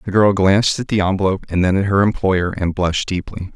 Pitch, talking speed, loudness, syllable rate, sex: 95 Hz, 235 wpm, -17 LUFS, 6.2 syllables/s, male